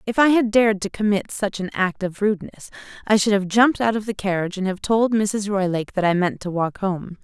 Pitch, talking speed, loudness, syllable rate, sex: 200 Hz, 250 wpm, -21 LUFS, 5.8 syllables/s, female